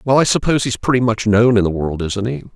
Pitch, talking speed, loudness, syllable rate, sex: 110 Hz, 280 wpm, -16 LUFS, 6.4 syllables/s, male